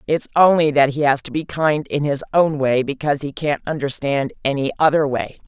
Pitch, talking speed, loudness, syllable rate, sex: 145 Hz, 195 wpm, -19 LUFS, 5.4 syllables/s, female